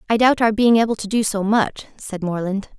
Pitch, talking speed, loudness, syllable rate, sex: 215 Hz, 235 wpm, -19 LUFS, 5.5 syllables/s, female